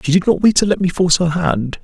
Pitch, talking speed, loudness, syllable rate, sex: 170 Hz, 325 wpm, -15 LUFS, 6.4 syllables/s, male